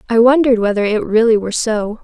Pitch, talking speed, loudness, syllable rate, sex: 225 Hz, 205 wpm, -14 LUFS, 6.5 syllables/s, female